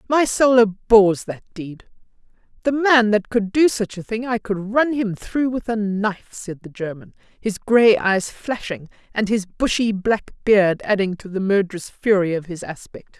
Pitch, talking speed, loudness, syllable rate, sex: 210 Hz, 185 wpm, -19 LUFS, 4.5 syllables/s, female